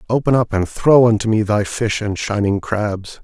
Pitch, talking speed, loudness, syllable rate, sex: 110 Hz, 205 wpm, -17 LUFS, 4.6 syllables/s, male